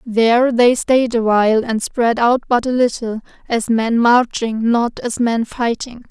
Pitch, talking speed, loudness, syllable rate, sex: 235 Hz, 165 wpm, -16 LUFS, 4.1 syllables/s, female